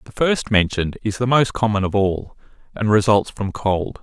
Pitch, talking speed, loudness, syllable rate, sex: 105 Hz, 195 wpm, -19 LUFS, 4.9 syllables/s, male